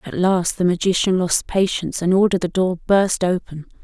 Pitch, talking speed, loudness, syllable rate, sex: 185 Hz, 190 wpm, -19 LUFS, 5.4 syllables/s, female